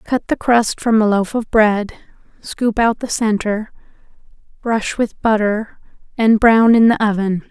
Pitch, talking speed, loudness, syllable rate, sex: 220 Hz, 160 wpm, -16 LUFS, 4.1 syllables/s, female